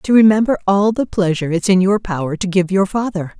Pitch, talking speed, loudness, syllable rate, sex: 190 Hz, 230 wpm, -16 LUFS, 5.9 syllables/s, female